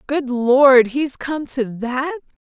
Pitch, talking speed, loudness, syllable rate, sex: 265 Hz, 145 wpm, -17 LUFS, 3.0 syllables/s, female